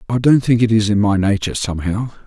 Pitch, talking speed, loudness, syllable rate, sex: 110 Hz, 240 wpm, -16 LUFS, 6.6 syllables/s, male